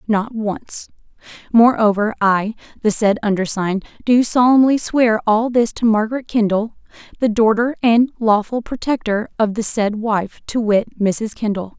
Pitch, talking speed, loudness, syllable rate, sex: 220 Hz, 145 wpm, -17 LUFS, 4.5 syllables/s, female